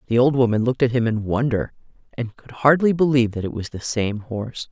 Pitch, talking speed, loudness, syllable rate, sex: 120 Hz, 230 wpm, -21 LUFS, 6.1 syllables/s, female